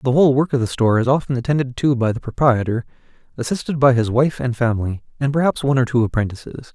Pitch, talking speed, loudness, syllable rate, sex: 130 Hz, 220 wpm, -19 LUFS, 6.9 syllables/s, male